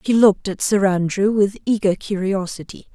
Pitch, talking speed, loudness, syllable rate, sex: 200 Hz, 165 wpm, -19 LUFS, 5.2 syllables/s, female